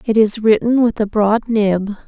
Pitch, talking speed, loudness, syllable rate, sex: 215 Hz, 205 wpm, -15 LUFS, 4.4 syllables/s, female